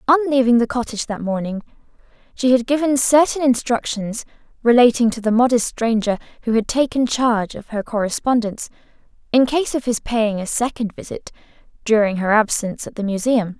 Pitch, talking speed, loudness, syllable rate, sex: 235 Hz, 160 wpm, -18 LUFS, 5.6 syllables/s, female